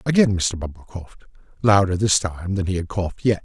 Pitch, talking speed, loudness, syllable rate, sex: 95 Hz, 190 wpm, -21 LUFS, 5.9 syllables/s, male